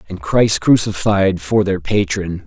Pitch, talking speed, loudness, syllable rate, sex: 95 Hz, 145 wpm, -16 LUFS, 3.9 syllables/s, male